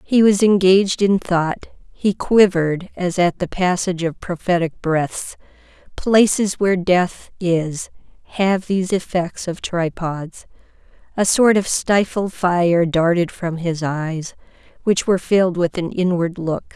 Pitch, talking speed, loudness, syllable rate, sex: 180 Hz, 140 wpm, -18 LUFS, 4.1 syllables/s, female